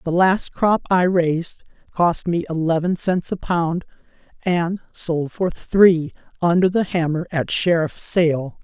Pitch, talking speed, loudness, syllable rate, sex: 170 Hz, 145 wpm, -19 LUFS, 3.8 syllables/s, female